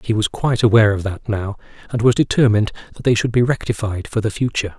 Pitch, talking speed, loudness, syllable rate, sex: 110 Hz, 225 wpm, -18 LUFS, 6.7 syllables/s, male